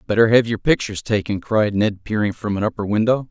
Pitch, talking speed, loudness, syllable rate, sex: 105 Hz, 220 wpm, -19 LUFS, 6.1 syllables/s, male